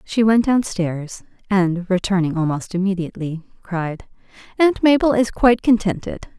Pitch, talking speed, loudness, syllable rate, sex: 200 Hz, 130 wpm, -19 LUFS, 4.7 syllables/s, female